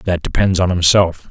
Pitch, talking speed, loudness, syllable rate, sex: 90 Hz, 185 wpm, -14 LUFS, 4.7 syllables/s, male